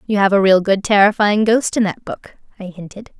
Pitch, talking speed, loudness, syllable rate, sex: 200 Hz, 225 wpm, -14 LUFS, 5.4 syllables/s, female